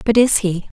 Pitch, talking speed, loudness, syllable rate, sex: 210 Hz, 225 wpm, -16 LUFS, 4.8 syllables/s, female